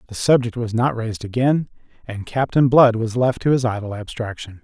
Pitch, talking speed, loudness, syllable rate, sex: 115 Hz, 195 wpm, -19 LUFS, 5.4 syllables/s, male